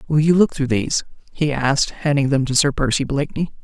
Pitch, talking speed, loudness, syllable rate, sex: 140 Hz, 215 wpm, -19 LUFS, 6.1 syllables/s, female